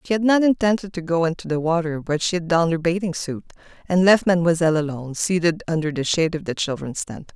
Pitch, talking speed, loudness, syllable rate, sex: 170 Hz, 220 wpm, -21 LUFS, 6.3 syllables/s, female